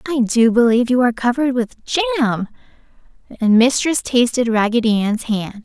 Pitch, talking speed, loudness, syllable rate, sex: 235 Hz, 150 wpm, -16 LUFS, 5.5 syllables/s, female